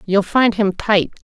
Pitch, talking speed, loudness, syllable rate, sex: 200 Hz, 185 wpm, -16 LUFS, 3.9 syllables/s, female